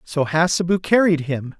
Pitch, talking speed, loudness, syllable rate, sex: 165 Hz, 150 wpm, -19 LUFS, 4.7 syllables/s, male